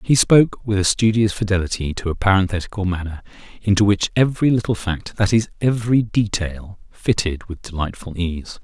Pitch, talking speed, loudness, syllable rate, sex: 100 Hz, 145 wpm, -19 LUFS, 5.5 syllables/s, male